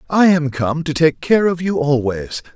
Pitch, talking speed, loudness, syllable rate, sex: 155 Hz, 210 wpm, -16 LUFS, 4.4 syllables/s, male